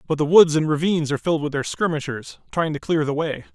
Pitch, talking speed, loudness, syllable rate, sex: 155 Hz, 255 wpm, -21 LUFS, 6.6 syllables/s, male